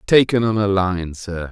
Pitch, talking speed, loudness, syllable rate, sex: 100 Hz, 200 wpm, -19 LUFS, 4.4 syllables/s, male